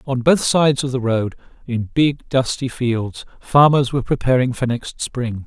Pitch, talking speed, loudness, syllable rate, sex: 125 Hz, 175 wpm, -18 LUFS, 4.5 syllables/s, male